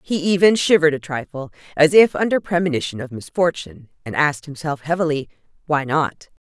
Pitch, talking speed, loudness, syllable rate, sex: 155 Hz, 160 wpm, -19 LUFS, 5.8 syllables/s, female